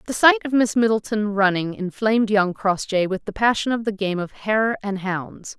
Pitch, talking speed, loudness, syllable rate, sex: 205 Hz, 205 wpm, -21 LUFS, 4.8 syllables/s, female